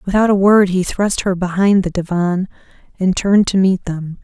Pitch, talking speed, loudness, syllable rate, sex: 190 Hz, 200 wpm, -15 LUFS, 5.0 syllables/s, female